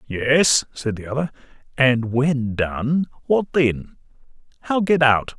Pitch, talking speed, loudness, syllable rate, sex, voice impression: 130 Hz, 135 wpm, -20 LUFS, 3.5 syllables/s, male, very masculine, old, very thick, tensed, very powerful, bright, soft, muffled, slightly fluent, slightly raspy, very cool, intellectual, slightly refreshing, sincere, very calm, very mature, very friendly, very reassuring, very unique, elegant, very wild, sweet, lively, very kind, slightly modest